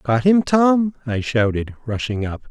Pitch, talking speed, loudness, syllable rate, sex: 135 Hz, 165 wpm, -19 LUFS, 4.2 syllables/s, male